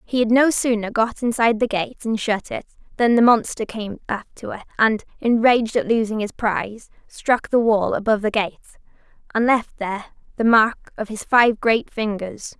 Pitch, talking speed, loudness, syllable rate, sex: 225 Hz, 190 wpm, -20 LUFS, 5.2 syllables/s, female